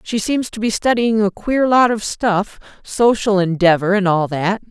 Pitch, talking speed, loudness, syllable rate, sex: 210 Hz, 180 wpm, -16 LUFS, 4.4 syllables/s, female